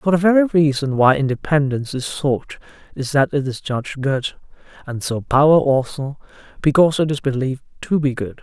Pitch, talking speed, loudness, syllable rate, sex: 140 Hz, 180 wpm, -18 LUFS, 5.4 syllables/s, male